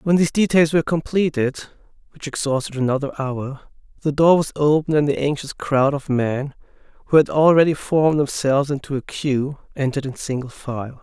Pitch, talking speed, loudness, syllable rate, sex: 145 Hz, 170 wpm, -20 LUFS, 5.6 syllables/s, male